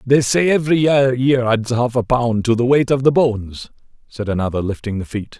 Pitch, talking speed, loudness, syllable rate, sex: 120 Hz, 210 wpm, -17 LUFS, 5.4 syllables/s, male